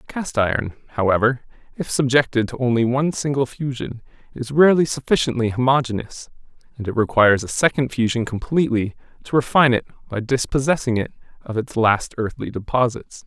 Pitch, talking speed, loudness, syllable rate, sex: 125 Hz, 145 wpm, -20 LUFS, 5.8 syllables/s, male